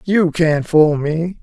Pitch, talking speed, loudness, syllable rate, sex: 165 Hz, 170 wpm, -15 LUFS, 3.0 syllables/s, male